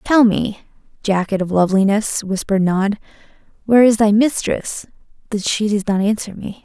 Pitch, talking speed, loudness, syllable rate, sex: 210 Hz, 155 wpm, -17 LUFS, 5.1 syllables/s, female